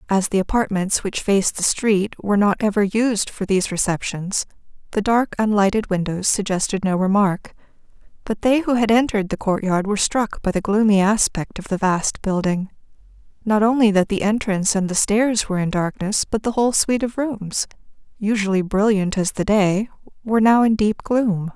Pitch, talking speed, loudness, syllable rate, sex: 205 Hz, 180 wpm, -19 LUFS, 5.2 syllables/s, female